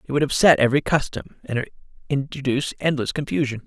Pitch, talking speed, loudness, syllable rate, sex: 135 Hz, 145 wpm, -21 LUFS, 6.3 syllables/s, male